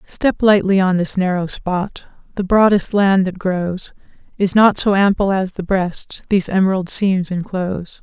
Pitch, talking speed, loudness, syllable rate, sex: 190 Hz, 165 wpm, -17 LUFS, 4.4 syllables/s, female